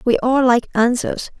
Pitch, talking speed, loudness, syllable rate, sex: 245 Hz, 170 wpm, -17 LUFS, 4.2 syllables/s, female